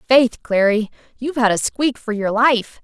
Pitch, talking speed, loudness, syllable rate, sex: 230 Hz, 190 wpm, -18 LUFS, 4.7 syllables/s, female